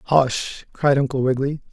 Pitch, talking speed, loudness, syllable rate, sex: 135 Hz, 140 wpm, -20 LUFS, 5.1 syllables/s, male